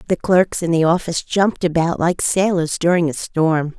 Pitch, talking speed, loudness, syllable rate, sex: 170 Hz, 190 wpm, -17 LUFS, 5.0 syllables/s, female